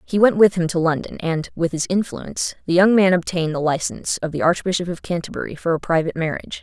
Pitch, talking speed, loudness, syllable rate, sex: 170 Hz, 225 wpm, -20 LUFS, 6.5 syllables/s, female